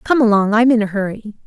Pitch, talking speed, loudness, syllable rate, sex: 220 Hz, 285 wpm, -15 LUFS, 7.1 syllables/s, female